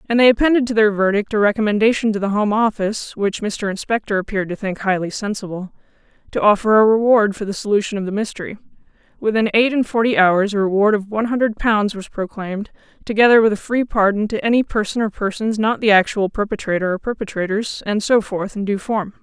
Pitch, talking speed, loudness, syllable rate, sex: 210 Hz, 205 wpm, -18 LUFS, 5.5 syllables/s, female